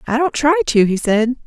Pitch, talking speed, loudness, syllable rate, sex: 240 Hz, 245 wpm, -16 LUFS, 5.4 syllables/s, female